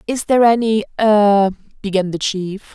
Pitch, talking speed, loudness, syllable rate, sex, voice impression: 210 Hz, 130 wpm, -16 LUFS, 4.6 syllables/s, female, feminine, slightly gender-neutral, very adult-like, middle-aged, slightly thin, slightly tensed, slightly powerful, bright, hard, clear, fluent, cool, intellectual, very refreshing, sincere, calm, friendly, reassuring, very unique, slightly elegant, wild, slightly sweet, lively, slightly strict, slightly intense, sharp, slightly modest, light